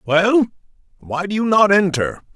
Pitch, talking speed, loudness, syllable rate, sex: 180 Hz, 155 wpm, -17 LUFS, 4.4 syllables/s, male